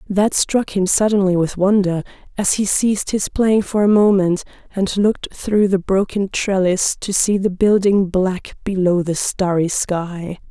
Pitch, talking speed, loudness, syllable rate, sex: 195 Hz, 165 wpm, -17 LUFS, 4.2 syllables/s, female